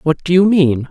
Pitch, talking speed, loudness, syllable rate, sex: 165 Hz, 265 wpm, -13 LUFS, 4.9 syllables/s, female